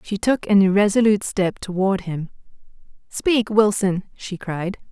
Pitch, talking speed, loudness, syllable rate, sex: 200 Hz, 135 wpm, -20 LUFS, 4.5 syllables/s, female